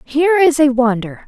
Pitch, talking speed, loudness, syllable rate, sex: 280 Hz, 190 wpm, -14 LUFS, 5.1 syllables/s, female